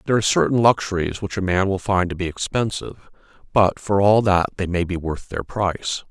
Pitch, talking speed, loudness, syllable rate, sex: 95 Hz, 215 wpm, -20 LUFS, 5.8 syllables/s, male